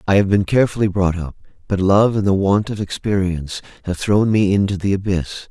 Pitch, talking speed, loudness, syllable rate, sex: 100 Hz, 205 wpm, -18 LUFS, 5.8 syllables/s, male